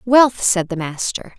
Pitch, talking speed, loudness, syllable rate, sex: 205 Hz, 175 wpm, -17 LUFS, 3.9 syllables/s, female